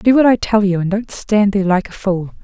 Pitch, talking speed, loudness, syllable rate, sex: 205 Hz, 295 wpm, -15 LUFS, 5.6 syllables/s, female